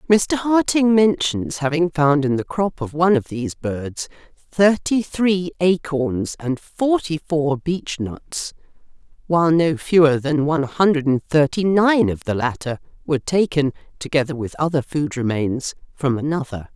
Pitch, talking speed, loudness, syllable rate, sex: 155 Hz, 145 wpm, -19 LUFS, 4.3 syllables/s, female